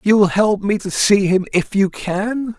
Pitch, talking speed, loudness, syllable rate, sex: 200 Hz, 230 wpm, -17 LUFS, 4.2 syllables/s, male